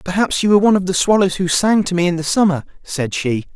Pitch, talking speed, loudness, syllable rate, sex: 180 Hz, 270 wpm, -16 LUFS, 6.5 syllables/s, male